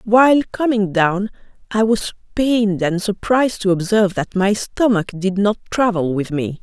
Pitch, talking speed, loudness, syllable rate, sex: 205 Hz, 165 wpm, -18 LUFS, 4.7 syllables/s, female